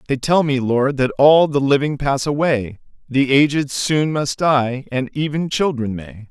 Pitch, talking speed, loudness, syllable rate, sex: 140 Hz, 180 wpm, -17 LUFS, 4.2 syllables/s, male